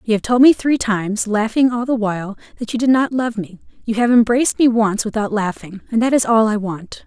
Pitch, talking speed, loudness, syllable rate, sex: 225 Hz, 245 wpm, -17 LUFS, 5.6 syllables/s, female